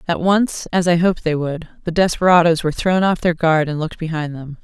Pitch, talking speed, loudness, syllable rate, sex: 165 Hz, 235 wpm, -17 LUFS, 5.9 syllables/s, female